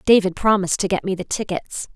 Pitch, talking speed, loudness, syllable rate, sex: 190 Hz, 215 wpm, -20 LUFS, 6.2 syllables/s, female